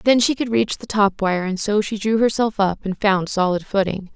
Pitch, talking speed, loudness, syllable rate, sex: 205 Hz, 245 wpm, -20 LUFS, 5.0 syllables/s, female